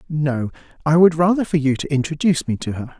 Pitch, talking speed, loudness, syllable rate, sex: 150 Hz, 220 wpm, -19 LUFS, 6.1 syllables/s, male